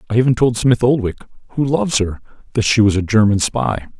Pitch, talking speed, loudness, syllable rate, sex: 115 Hz, 210 wpm, -16 LUFS, 6.1 syllables/s, male